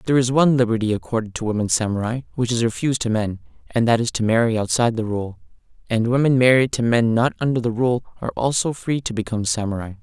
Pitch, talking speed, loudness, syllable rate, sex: 115 Hz, 215 wpm, -20 LUFS, 6.7 syllables/s, male